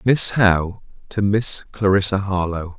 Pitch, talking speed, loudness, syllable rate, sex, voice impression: 100 Hz, 130 wpm, -18 LUFS, 4.6 syllables/s, male, masculine, slightly middle-aged, relaxed, slightly weak, slightly muffled, raspy, intellectual, mature, wild, strict, slightly modest